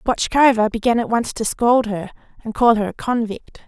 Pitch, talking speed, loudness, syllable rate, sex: 230 Hz, 195 wpm, -18 LUFS, 5.1 syllables/s, female